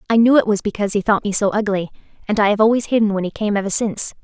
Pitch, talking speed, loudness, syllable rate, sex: 210 Hz, 285 wpm, -18 LUFS, 7.6 syllables/s, female